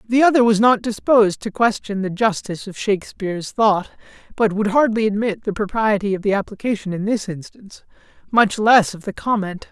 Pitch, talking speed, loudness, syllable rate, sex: 210 Hz, 180 wpm, -19 LUFS, 5.5 syllables/s, male